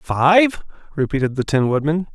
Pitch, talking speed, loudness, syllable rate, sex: 155 Hz, 140 wpm, -18 LUFS, 4.6 syllables/s, male